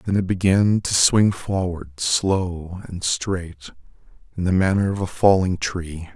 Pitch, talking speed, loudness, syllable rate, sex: 90 Hz, 155 wpm, -20 LUFS, 3.9 syllables/s, male